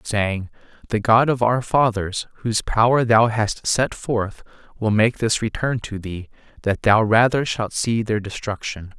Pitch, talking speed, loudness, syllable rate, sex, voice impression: 110 Hz, 165 wpm, -20 LUFS, 4.2 syllables/s, male, masculine, adult-like, tensed, slightly bright, clear, fluent, cool, calm, wild, lively